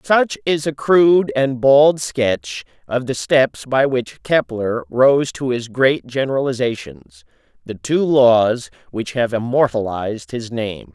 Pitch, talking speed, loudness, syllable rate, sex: 130 Hz, 135 wpm, -17 LUFS, 3.7 syllables/s, male